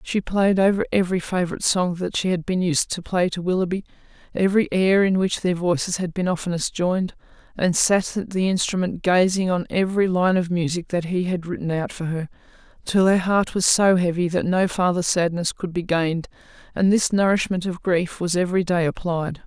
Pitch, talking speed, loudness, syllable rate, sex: 180 Hz, 200 wpm, -21 LUFS, 5.5 syllables/s, female